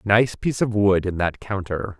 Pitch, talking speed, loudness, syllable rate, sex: 100 Hz, 210 wpm, -22 LUFS, 4.8 syllables/s, male